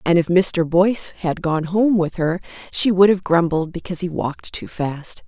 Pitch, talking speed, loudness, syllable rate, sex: 175 Hz, 205 wpm, -19 LUFS, 4.8 syllables/s, female